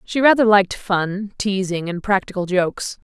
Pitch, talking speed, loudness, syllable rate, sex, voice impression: 195 Hz, 155 wpm, -19 LUFS, 4.8 syllables/s, female, very feminine, adult-like, slightly fluent, intellectual, slightly calm, slightly strict